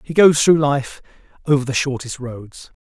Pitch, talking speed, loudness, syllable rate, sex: 140 Hz, 170 wpm, -17 LUFS, 4.6 syllables/s, male